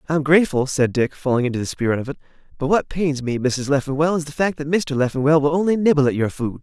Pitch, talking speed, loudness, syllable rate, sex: 145 Hz, 255 wpm, -20 LUFS, 6.5 syllables/s, male